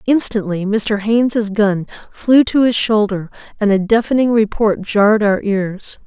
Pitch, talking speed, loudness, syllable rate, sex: 210 Hz, 150 wpm, -15 LUFS, 4.3 syllables/s, female